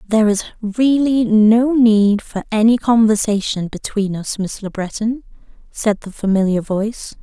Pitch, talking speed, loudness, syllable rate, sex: 215 Hz, 140 wpm, -16 LUFS, 4.4 syllables/s, female